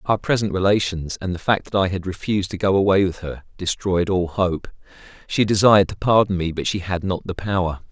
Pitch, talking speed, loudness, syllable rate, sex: 95 Hz, 220 wpm, -20 LUFS, 5.7 syllables/s, male